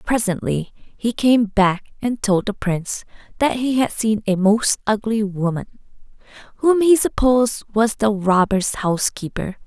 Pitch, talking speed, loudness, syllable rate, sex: 215 Hz, 145 wpm, -19 LUFS, 4.2 syllables/s, female